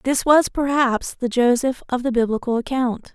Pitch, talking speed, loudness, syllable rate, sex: 250 Hz, 170 wpm, -20 LUFS, 4.6 syllables/s, female